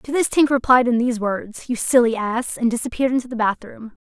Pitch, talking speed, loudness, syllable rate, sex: 240 Hz, 225 wpm, -19 LUFS, 6.0 syllables/s, female